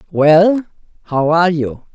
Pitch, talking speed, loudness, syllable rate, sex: 165 Hz, 125 wpm, -14 LUFS, 3.9 syllables/s, female